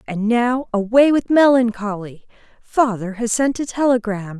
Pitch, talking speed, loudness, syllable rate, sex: 230 Hz, 135 wpm, -18 LUFS, 4.4 syllables/s, female